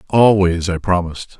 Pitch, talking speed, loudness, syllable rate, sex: 90 Hz, 130 wpm, -16 LUFS, 5.0 syllables/s, male